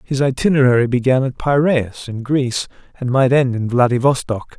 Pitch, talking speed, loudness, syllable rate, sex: 130 Hz, 155 wpm, -17 LUFS, 5.2 syllables/s, male